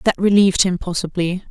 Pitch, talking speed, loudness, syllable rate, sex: 185 Hz, 160 wpm, -17 LUFS, 6.1 syllables/s, female